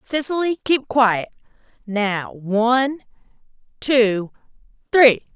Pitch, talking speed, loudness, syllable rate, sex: 240 Hz, 55 wpm, -19 LUFS, 3.2 syllables/s, female